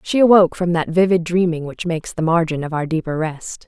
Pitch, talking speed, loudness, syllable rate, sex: 170 Hz, 230 wpm, -18 LUFS, 5.9 syllables/s, female